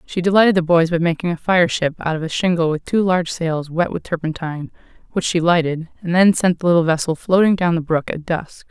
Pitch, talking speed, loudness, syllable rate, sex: 170 Hz, 240 wpm, -18 LUFS, 5.9 syllables/s, female